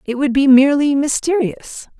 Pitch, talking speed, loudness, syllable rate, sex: 275 Hz, 150 wpm, -14 LUFS, 5.0 syllables/s, female